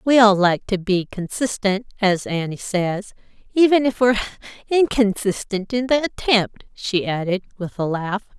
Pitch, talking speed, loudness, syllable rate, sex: 210 Hz, 145 wpm, -20 LUFS, 4.5 syllables/s, female